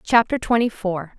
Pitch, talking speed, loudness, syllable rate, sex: 210 Hz, 150 wpm, -20 LUFS, 4.6 syllables/s, female